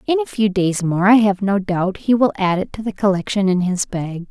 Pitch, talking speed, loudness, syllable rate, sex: 200 Hz, 265 wpm, -18 LUFS, 5.1 syllables/s, female